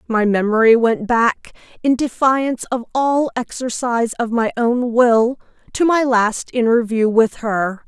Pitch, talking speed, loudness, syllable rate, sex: 235 Hz, 145 wpm, -17 LUFS, 4.2 syllables/s, female